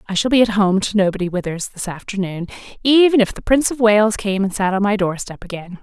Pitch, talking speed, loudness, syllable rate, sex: 205 Hz, 235 wpm, -17 LUFS, 6.0 syllables/s, female